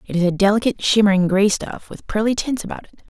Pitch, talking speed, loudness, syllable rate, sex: 205 Hz, 225 wpm, -18 LUFS, 6.6 syllables/s, female